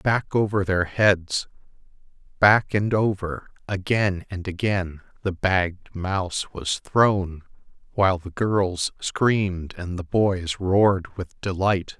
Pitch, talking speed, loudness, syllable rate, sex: 95 Hz, 125 wpm, -23 LUFS, 3.5 syllables/s, male